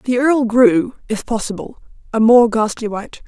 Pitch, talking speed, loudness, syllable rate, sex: 230 Hz, 165 wpm, -16 LUFS, 4.6 syllables/s, female